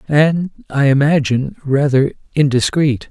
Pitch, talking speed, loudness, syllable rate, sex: 140 Hz, 60 wpm, -15 LUFS, 4.5 syllables/s, male